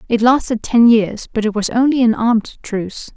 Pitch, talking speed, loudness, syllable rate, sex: 230 Hz, 210 wpm, -15 LUFS, 5.3 syllables/s, female